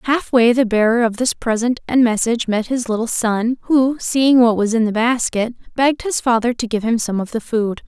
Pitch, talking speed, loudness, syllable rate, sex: 235 Hz, 220 wpm, -17 LUFS, 5.2 syllables/s, female